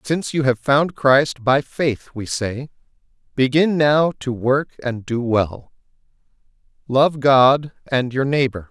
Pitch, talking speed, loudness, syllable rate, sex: 135 Hz, 145 wpm, -18 LUFS, 3.6 syllables/s, male